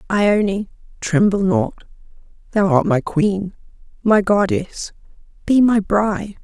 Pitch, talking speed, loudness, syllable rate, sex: 205 Hz, 95 wpm, -18 LUFS, 3.6 syllables/s, female